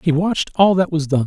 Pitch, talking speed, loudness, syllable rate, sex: 165 Hz, 285 wpm, -17 LUFS, 6.3 syllables/s, male